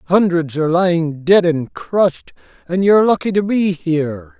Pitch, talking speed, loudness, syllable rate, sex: 170 Hz, 175 wpm, -16 LUFS, 5.2 syllables/s, male